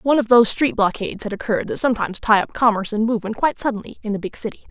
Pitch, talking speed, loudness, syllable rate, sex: 220 Hz, 255 wpm, -19 LUFS, 8.1 syllables/s, female